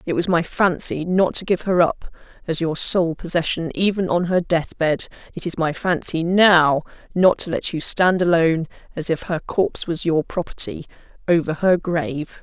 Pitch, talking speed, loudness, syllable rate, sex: 170 Hz, 180 wpm, -20 LUFS, 4.8 syllables/s, female